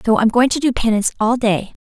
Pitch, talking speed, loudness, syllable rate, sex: 230 Hz, 260 wpm, -16 LUFS, 6.4 syllables/s, female